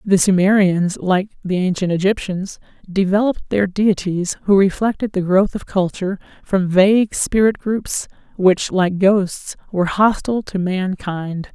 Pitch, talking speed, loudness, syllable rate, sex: 190 Hz, 135 wpm, -18 LUFS, 4.5 syllables/s, female